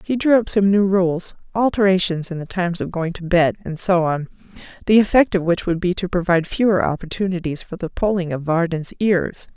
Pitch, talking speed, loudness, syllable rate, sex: 180 Hz, 195 wpm, -19 LUFS, 5.5 syllables/s, female